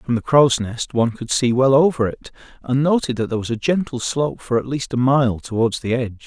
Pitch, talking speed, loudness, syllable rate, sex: 125 Hz, 250 wpm, -19 LUFS, 5.7 syllables/s, male